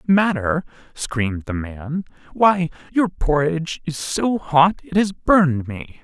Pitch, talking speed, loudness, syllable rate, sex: 160 Hz, 140 wpm, -20 LUFS, 3.8 syllables/s, male